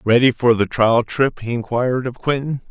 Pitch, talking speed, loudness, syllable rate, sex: 120 Hz, 200 wpm, -18 LUFS, 5.3 syllables/s, male